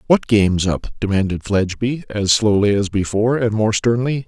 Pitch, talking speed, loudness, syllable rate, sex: 105 Hz, 170 wpm, -18 LUFS, 5.3 syllables/s, male